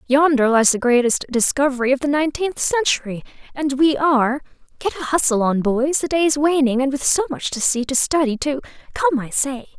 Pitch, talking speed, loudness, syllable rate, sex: 270 Hz, 190 wpm, -18 LUFS, 5.5 syllables/s, female